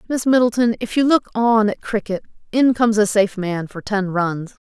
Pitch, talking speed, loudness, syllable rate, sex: 215 Hz, 205 wpm, -18 LUFS, 5.2 syllables/s, female